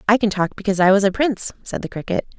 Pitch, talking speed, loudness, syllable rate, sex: 205 Hz, 275 wpm, -19 LUFS, 7.3 syllables/s, female